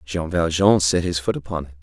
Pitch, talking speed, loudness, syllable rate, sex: 80 Hz, 230 wpm, -20 LUFS, 5.4 syllables/s, male